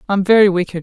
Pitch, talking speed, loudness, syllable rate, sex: 195 Hz, 220 wpm, -13 LUFS, 7.1 syllables/s, female